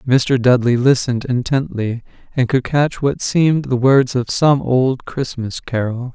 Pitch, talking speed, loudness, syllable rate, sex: 130 Hz, 155 wpm, -17 LUFS, 4.2 syllables/s, male